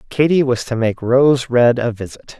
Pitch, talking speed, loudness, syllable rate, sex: 125 Hz, 200 wpm, -15 LUFS, 4.6 syllables/s, male